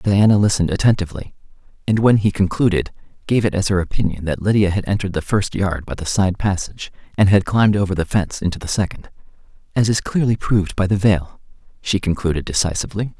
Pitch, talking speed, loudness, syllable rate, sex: 95 Hz, 190 wpm, -18 LUFS, 6.5 syllables/s, male